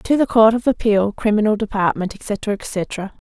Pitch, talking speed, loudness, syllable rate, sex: 215 Hz, 165 wpm, -18 LUFS, 4.4 syllables/s, female